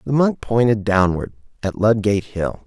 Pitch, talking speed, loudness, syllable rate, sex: 105 Hz, 160 wpm, -19 LUFS, 4.9 syllables/s, male